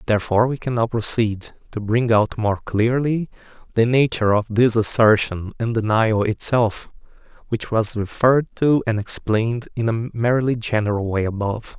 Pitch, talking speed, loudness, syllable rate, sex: 115 Hz, 155 wpm, -20 LUFS, 5.0 syllables/s, male